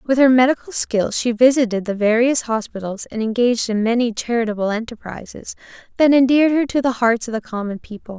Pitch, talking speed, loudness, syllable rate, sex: 235 Hz, 185 wpm, -18 LUFS, 5.8 syllables/s, female